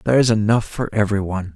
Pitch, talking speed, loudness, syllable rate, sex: 105 Hz, 155 wpm, -19 LUFS, 6.3 syllables/s, male